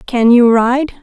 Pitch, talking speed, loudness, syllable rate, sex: 245 Hz, 175 wpm, -11 LUFS, 3.4 syllables/s, female